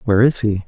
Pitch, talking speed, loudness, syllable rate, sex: 105 Hz, 270 wpm, -16 LUFS, 7.3 syllables/s, male